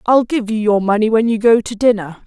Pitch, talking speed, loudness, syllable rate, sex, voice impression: 220 Hz, 265 wpm, -15 LUFS, 5.6 syllables/s, female, very feminine, adult-like, slightly middle-aged, thin, slightly relaxed, weak, slightly bright, hard, clear, slightly halting, slightly cute, intellectual, slightly refreshing, sincere, slightly calm, friendly, reassuring, unique, slightly elegant, wild, slightly sweet, lively, strict, slightly intense, sharp, light